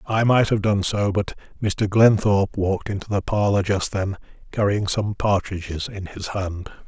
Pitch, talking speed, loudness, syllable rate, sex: 100 Hz, 175 wpm, -22 LUFS, 4.7 syllables/s, male